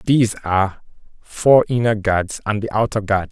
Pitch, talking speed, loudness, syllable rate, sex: 105 Hz, 165 wpm, -18 LUFS, 4.7 syllables/s, male